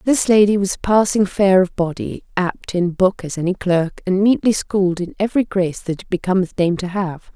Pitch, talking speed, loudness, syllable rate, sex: 190 Hz, 205 wpm, -18 LUFS, 5.2 syllables/s, female